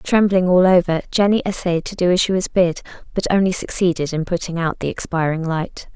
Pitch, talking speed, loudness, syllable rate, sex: 180 Hz, 200 wpm, -18 LUFS, 5.6 syllables/s, female